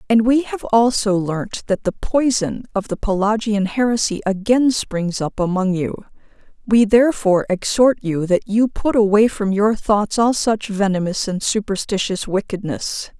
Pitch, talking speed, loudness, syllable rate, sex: 210 Hz, 155 wpm, -18 LUFS, 4.5 syllables/s, female